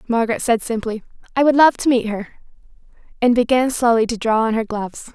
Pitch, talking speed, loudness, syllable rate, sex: 235 Hz, 200 wpm, -18 LUFS, 6.0 syllables/s, female